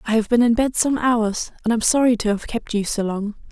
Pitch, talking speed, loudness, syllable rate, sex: 225 Hz, 275 wpm, -20 LUFS, 5.4 syllables/s, female